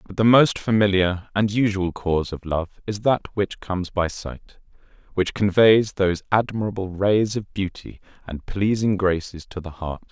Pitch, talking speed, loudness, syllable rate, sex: 100 Hz, 165 wpm, -22 LUFS, 4.6 syllables/s, male